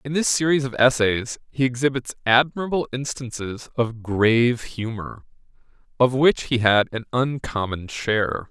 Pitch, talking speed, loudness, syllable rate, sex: 125 Hz, 135 wpm, -22 LUFS, 4.5 syllables/s, male